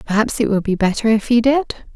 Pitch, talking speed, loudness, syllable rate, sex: 225 Hz, 245 wpm, -17 LUFS, 6.2 syllables/s, female